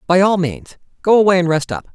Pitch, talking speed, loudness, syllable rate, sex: 175 Hz, 245 wpm, -15 LUFS, 5.9 syllables/s, male